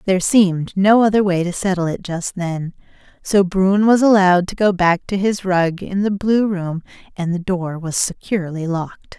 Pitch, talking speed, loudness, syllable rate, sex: 185 Hz, 195 wpm, -17 LUFS, 4.9 syllables/s, female